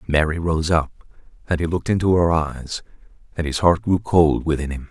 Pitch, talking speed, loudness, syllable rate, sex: 80 Hz, 195 wpm, -20 LUFS, 5.5 syllables/s, male